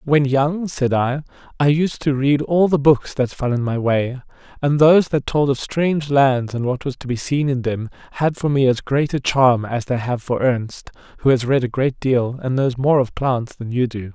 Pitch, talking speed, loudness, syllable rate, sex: 135 Hz, 240 wpm, -19 LUFS, 4.8 syllables/s, male